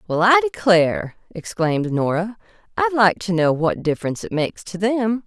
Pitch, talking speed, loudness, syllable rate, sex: 195 Hz, 170 wpm, -19 LUFS, 5.3 syllables/s, female